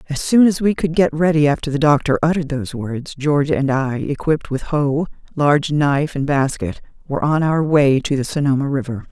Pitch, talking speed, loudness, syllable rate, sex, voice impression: 145 Hz, 205 wpm, -18 LUFS, 5.7 syllables/s, female, feminine, adult-like, tensed, powerful, soft, clear, fluent, intellectual, friendly, reassuring, elegant, lively, kind